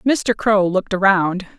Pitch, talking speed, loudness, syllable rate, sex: 200 Hz, 150 wpm, -17 LUFS, 4.4 syllables/s, female